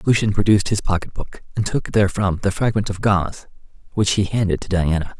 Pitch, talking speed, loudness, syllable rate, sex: 100 Hz, 185 wpm, -20 LUFS, 6.1 syllables/s, male